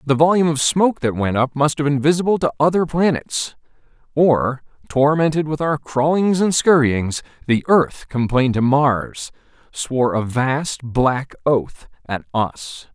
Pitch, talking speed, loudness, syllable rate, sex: 140 Hz, 150 wpm, -18 LUFS, 4.3 syllables/s, male